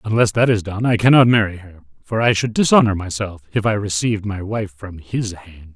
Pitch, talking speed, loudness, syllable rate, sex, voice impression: 105 Hz, 220 wpm, -18 LUFS, 5.5 syllables/s, male, very masculine, very adult-like, thick, cool, slightly intellectual, slightly calm